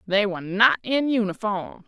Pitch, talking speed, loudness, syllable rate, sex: 210 Hz, 160 wpm, -22 LUFS, 4.8 syllables/s, female